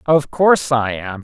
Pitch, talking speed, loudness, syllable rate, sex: 130 Hz, 195 wpm, -16 LUFS, 4.5 syllables/s, male